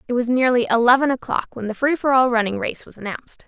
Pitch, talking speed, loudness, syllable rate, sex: 245 Hz, 240 wpm, -19 LUFS, 6.6 syllables/s, female